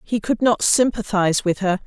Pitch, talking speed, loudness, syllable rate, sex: 205 Hz, 195 wpm, -19 LUFS, 5.2 syllables/s, female